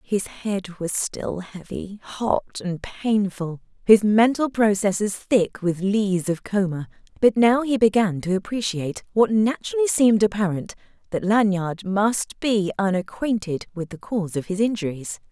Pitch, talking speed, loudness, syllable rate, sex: 205 Hz, 145 wpm, -22 LUFS, 4.4 syllables/s, female